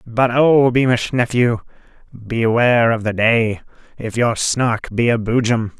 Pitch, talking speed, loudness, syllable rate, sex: 115 Hz, 145 wpm, -16 LUFS, 4.0 syllables/s, male